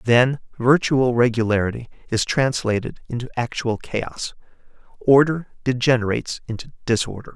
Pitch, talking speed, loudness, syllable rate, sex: 120 Hz, 100 wpm, -21 LUFS, 5.0 syllables/s, male